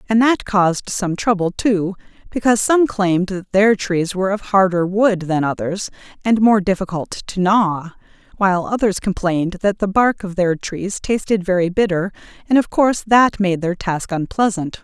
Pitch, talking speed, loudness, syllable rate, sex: 195 Hz, 165 wpm, -18 LUFS, 4.7 syllables/s, female